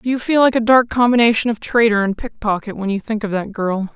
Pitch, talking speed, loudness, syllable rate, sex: 225 Hz, 260 wpm, -17 LUFS, 5.9 syllables/s, female